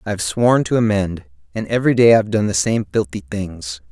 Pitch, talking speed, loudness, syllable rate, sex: 100 Hz, 200 wpm, -17 LUFS, 5.4 syllables/s, male